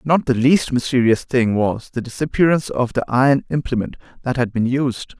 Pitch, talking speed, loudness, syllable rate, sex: 130 Hz, 185 wpm, -18 LUFS, 5.4 syllables/s, male